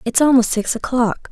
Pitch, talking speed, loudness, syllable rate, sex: 240 Hz, 185 wpm, -17 LUFS, 5.0 syllables/s, female